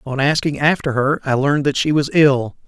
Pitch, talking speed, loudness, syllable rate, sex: 140 Hz, 225 wpm, -17 LUFS, 5.4 syllables/s, male